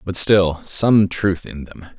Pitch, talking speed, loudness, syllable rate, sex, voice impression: 95 Hz, 150 wpm, -17 LUFS, 3.4 syllables/s, male, very masculine, very adult-like, middle-aged, very thick, slightly relaxed, slightly powerful, slightly dark, hard, very clear, slightly fluent, very cool, intellectual, very sincere, very calm, friendly, very reassuring, slightly unique, elegant, slightly wild, slightly lively, slightly kind, slightly modest